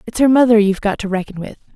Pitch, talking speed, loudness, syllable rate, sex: 215 Hz, 275 wpm, -15 LUFS, 7.5 syllables/s, female